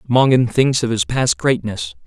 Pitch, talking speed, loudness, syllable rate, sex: 115 Hz, 175 wpm, -17 LUFS, 4.3 syllables/s, male